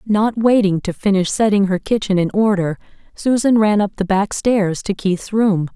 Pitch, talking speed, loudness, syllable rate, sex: 200 Hz, 190 wpm, -17 LUFS, 4.6 syllables/s, female